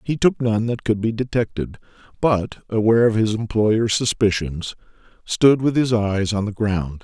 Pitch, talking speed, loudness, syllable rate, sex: 110 Hz, 170 wpm, -20 LUFS, 4.5 syllables/s, male